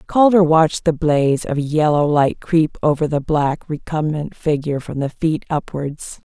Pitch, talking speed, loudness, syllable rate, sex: 155 Hz, 160 wpm, -18 LUFS, 4.5 syllables/s, female